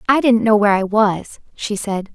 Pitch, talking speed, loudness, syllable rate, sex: 215 Hz, 225 wpm, -16 LUFS, 4.9 syllables/s, female